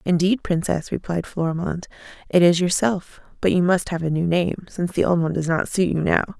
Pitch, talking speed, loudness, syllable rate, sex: 175 Hz, 215 wpm, -21 LUFS, 5.7 syllables/s, female